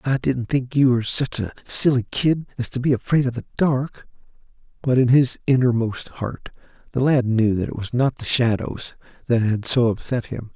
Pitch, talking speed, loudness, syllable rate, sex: 125 Hz, 200 wpm, -21 LUFS, 4.9 syllables/s, male